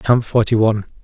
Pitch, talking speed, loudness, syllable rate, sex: 110 Hz, 175 wpm, -16 LUFS, 5.9 syllables/s, male